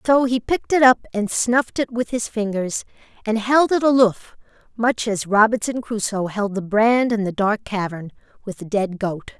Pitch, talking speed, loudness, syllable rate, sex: 220 Hz, 190 wpm, -20 LUFS, 4.7 syllables/s, female